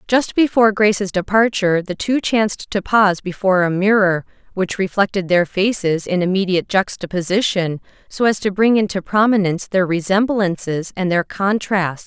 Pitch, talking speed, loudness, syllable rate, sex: 195 Hz, 150 wpm, -17 LUFS, 5.2 syllables/s, female